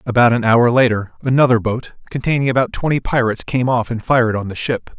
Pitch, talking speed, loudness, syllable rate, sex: 120 Hz, 205 wpm, -16 LUFS, 6.1 syllables/s, male